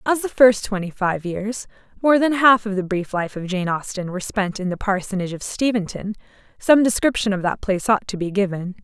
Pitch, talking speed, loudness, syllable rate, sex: 205 Hz, 215 wpm, -20 LUFS, 5.6 syllables/s, female